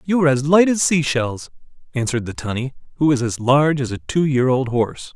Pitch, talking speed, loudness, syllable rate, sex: 135 Hz, 235 wpm, -19 LUFS, 6.0 syllables/s, male